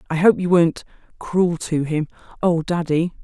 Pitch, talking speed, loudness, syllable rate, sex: 170 Hz, 150 wpm, -20 LUFS, 4.7 syllables/s, female